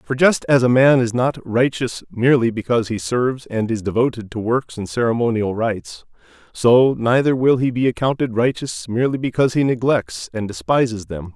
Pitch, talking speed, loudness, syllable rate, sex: 120 Hz, 180 wpm, -18 LUFS, 5.3 syllables/s, male